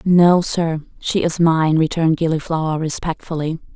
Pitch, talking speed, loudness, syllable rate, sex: 160 Hz, 130 wpm, -18 LUFS, 4.8 syllables/s, female